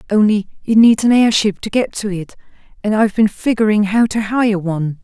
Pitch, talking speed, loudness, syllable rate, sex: 210 Hz, 205 wpm, -15 LUFS, 5.5 syllables/s, female